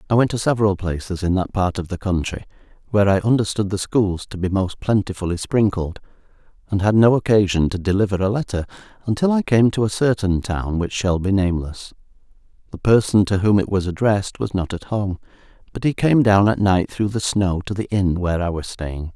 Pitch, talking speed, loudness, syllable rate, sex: 100 Hz, 210 wpm, -20 LUFS, 5.7 syllables/s, male